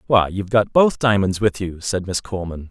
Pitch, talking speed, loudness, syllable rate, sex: 100 Hz, 220 wpm, -19 LUFS, 5.5 syllables/s, male